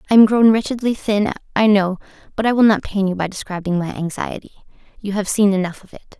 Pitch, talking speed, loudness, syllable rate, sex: 200 Hz, 225 wpm, -18 LUFS, 6.1 syllables/s, female